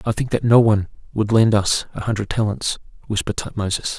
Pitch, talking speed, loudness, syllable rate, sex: 105 Hz, 195 wpm, -20 LUFS, 6.2 syllables/s, male